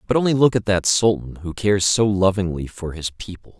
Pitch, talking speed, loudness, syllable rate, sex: 100 Hz, 215 wpm, -19 LUFS, 5.5 syllables/s, male